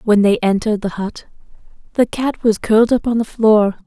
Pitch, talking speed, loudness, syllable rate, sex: 215 Hz, 200 wpm, -16 LUFS, 5.3 syllables/s, female